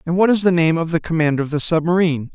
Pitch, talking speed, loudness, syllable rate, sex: 165 Hz, 280 wpm, -17 LUFS, 7.2 syllables/s, male